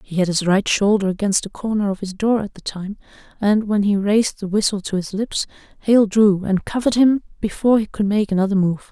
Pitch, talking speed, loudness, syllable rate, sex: 205 Hz, 230 wpm, -19 LUFS, 5.7 syllables/s, female